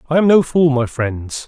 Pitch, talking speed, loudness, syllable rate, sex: 145 Hz, 245 wpm, -15 LUFS, 4.7 syllables/s, male